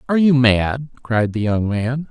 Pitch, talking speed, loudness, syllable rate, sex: 125 Hz, 200 wpm, -17 LUFS, 4.4 syllables/s, male